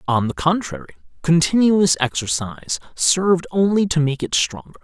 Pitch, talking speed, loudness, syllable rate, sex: 155 Hz, 135 wpm, -19 LUFS, 5.1 syllables/s, male